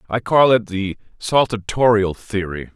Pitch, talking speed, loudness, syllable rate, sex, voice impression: 105 Hz, 130 wpm, -18 LUFS, 4.3 syllables/s, male, very masculine, very adult-like, middle-aged, very thick, tensed, powerful, slightly bright, slightly soft, slightly clear, fluent, slightly raspy, very cool, very intellectual, slightly refreshing, very sincere, very calm, very mature, very friendly, very reassuring, unique, elegant, wild, sweet, slightly lively, slightly strict, slightly intense, slightly modest